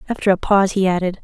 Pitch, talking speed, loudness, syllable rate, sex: 190 Hz, 240 wpm, -17 LUFS, 7.6 syllables/s, female